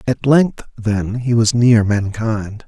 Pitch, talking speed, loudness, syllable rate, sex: 115 Hz, 155 wpm, -16 LUFS, 3.3 syllables/s, male